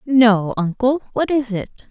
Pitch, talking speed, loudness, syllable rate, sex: 240 Hz, 155 wpm, -18 LUFS, 3.7 syllables/s, female